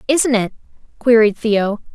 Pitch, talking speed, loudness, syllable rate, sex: 225 Hz, 125 wpm, -16 LUFS, 4.1 syllables/s, female